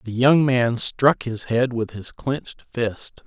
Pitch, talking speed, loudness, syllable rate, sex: 120 Hz, 185 wpm, -21 LUFS, 3.5 syllables/s, male